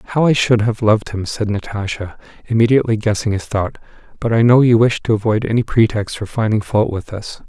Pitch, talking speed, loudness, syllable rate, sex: 110 Hz, 210 wpm, -16 LUFS, 5.9 syllables/s, male